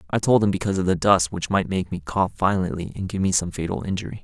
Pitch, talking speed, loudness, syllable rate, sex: 95 Hz, 270 wpm, -22 LUFS, 6.5 syllables/s, male